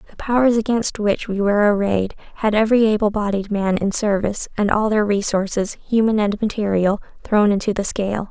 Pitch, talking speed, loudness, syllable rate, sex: 210 Hz, 180 wpm, -19 LUFS, 5.7 syllables/s, female